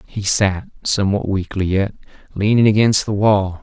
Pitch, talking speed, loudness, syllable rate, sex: 100 Hz, 150 wpm, -17 LUFS, 4.8 syllables/s, male